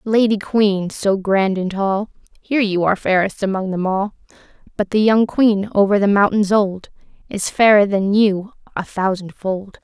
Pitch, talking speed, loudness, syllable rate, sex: 200 Hz, 165 wpm, -17 LUFS, 4.6 syllables/s, female